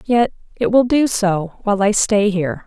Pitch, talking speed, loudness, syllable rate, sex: 210 Hz, 205 wpm, -17 LUFS, 4.8 syllables/s, female